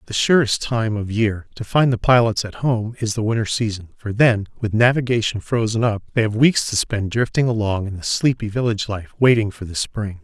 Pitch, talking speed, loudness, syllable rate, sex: 110 Hz, 215 wpm, -19 LUFS, 5.4 syllables/s, male